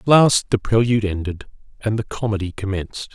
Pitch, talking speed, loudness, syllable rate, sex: 105 Hz, 170 wpm, -20 LUFS, 5.7 syllables/s, male